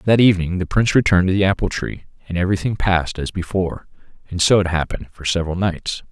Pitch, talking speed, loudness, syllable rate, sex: 90 Hz, 205 wpm, -19 LUFS, 6.9 syllables/s, male